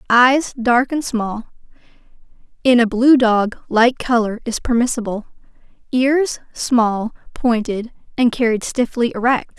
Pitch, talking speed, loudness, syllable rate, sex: 240 Hz, 105 wpm, -17 LUFS, 2.6 syllables/s, female